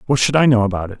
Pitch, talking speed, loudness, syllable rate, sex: 120 Hz, 360 wpm, -15 LUFS, 8.4 syllables/s, male